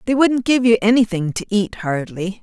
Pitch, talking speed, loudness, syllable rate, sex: 215 Hz, 200 wpm, -17 LUFS, 5.1 syllables/s, female